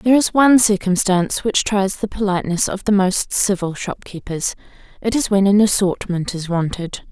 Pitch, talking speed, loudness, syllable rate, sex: 195 Hz, 170 wpm, -18 LUFS, 5.2 syllables/s, female